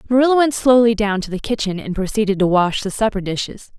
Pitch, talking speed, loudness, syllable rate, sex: 215 Hz, 220 wpm, -17 LUFS, 6.2 syllables/s, female